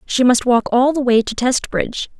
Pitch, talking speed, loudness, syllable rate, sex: 245 Hz, 220 wpm, -16 LUFS, 5.0 syllables/s, female